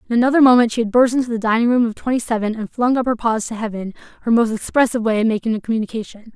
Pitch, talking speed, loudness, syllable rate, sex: 230 Hz, 265 wpm, -18 LUFS, 7.5 syllables/s, female